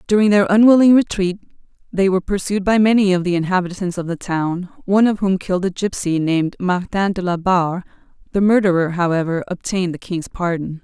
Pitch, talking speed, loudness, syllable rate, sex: 185 Hz, 185 wpm, -17 LUFS, 6.0 syllables/s, female